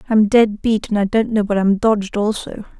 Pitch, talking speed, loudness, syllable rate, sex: 210 Hz, 235 wpm, -17 LUFS, 5.3 syllables/s, female